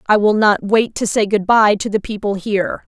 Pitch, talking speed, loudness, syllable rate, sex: 210 Hz, 245 wpm, -16 LUFS, 5.3 syllables/s, female